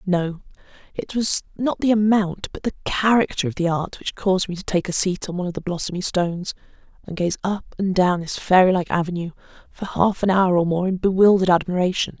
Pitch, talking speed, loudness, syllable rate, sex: 185 Hz, 210 wpm, -21 LUFS, 5.8 syllables/s, female